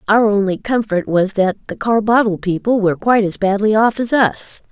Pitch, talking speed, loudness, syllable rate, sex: 210 Hz, 190 wpm, -16 LUFS, 5.3 syllables/s, female